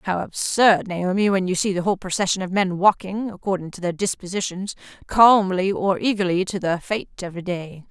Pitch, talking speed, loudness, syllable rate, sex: 190 Hz, 165 wpm, -21 LUFS, 5.5 syllables/s, female